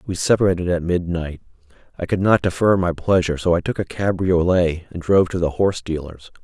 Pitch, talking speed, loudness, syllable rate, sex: 90 Hz, 195 wpm, -19 LUFS, 6.0 syllables/s, male